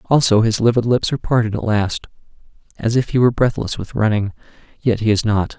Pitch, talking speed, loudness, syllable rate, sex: 115 Hz, 205 wpm, -18 LUFS, 6.0 syllables/s, male